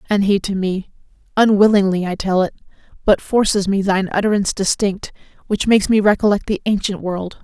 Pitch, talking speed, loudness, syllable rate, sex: 200 Hz, 170 wpm, -17 LUFS, 5.8 syllables/s, female